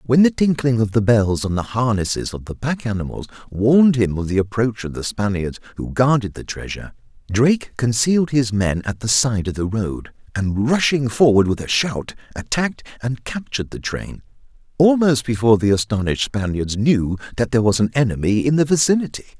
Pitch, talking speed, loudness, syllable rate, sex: 115 Hz, 185 wpm, -19 LUFS, 5.5 syllables/s, male